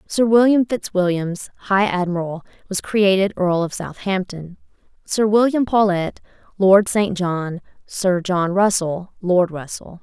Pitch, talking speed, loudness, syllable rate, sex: 190 Hz, 130 wpm, -19 LUFS, 4.0 syllables/s, female